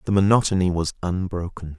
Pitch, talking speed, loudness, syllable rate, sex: 90 Hz, 135 wpm, -22 LUFS, 5.7 syllables/s, male